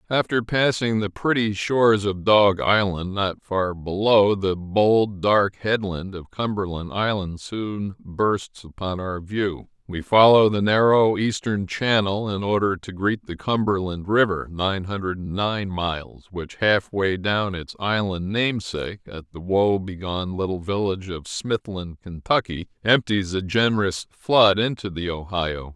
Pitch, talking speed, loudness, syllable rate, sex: 100 Hz, 140 wpm, -22 LUFS, 3.9 syllables/s, male